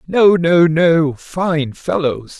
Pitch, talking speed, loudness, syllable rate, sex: 165 Hz, 125 wpm, -15 LUFS, 2.7 syllables/s, male